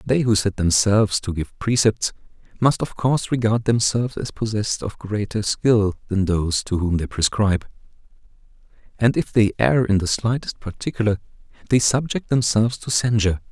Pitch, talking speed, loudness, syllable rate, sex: 110 Hz, 160 wpm, -20 LUFS, 5.4 syllables/s, male